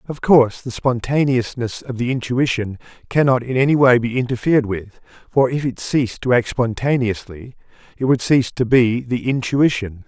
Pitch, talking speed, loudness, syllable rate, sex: 125 Hz, 165 wpm, -18 LUFS, 5.1 syllables/s, male